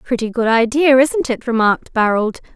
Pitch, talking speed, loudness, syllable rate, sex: 240 Hz, 165 wpm, -15 LUFS, 5.3 syllables/s, female